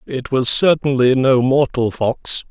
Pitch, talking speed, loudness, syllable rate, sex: 130 Hz, 145 wpm, -16 LUFS, 3.9 syllables/s, male